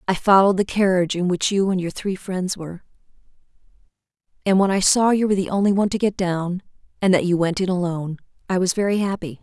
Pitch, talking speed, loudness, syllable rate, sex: 185 Hz, 215 wpm, -20 LUFS, 6.6 syllables/s, female